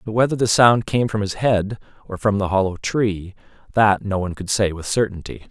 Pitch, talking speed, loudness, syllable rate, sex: 105 Hz, 220 wpm, -19 LUFS, 5.3 syllables/s, male